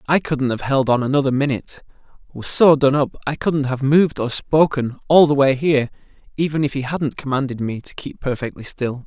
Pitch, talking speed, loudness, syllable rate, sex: 140 Hz, 200 wpm, -19 LUFS, 5.5 syllables/s, male